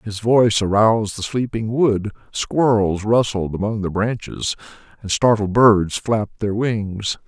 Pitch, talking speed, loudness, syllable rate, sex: 110 Hz, 140 wpm, -19 LUFS, 4.2 syllables/s, male